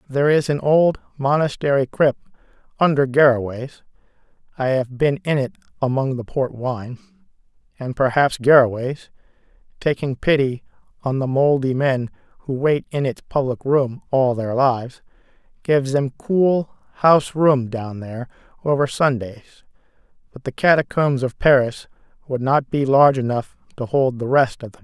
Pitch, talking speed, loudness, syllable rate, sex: 135 Hz, 145 wpm, -19 LUFS, 4.5 syllables/s, male